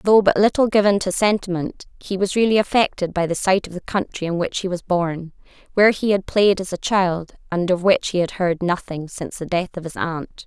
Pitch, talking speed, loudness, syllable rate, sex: 185 Hz, 230 wpm, -20 LUFS, 5.4 syllables/s, female